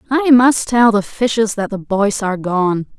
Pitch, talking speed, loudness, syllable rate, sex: 215 Hz, 200 wpm, -15 LUFS, 4.4 syllables/s, female